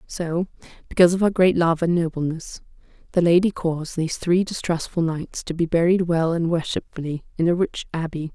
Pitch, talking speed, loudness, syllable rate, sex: 170 Hz, 180 wpm, -22 LUFS, 5.5 syllables/s, female